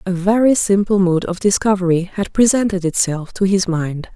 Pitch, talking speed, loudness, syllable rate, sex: 190 Hz, 175 wpm, -16 LUFS, 5.0 syllables/s, female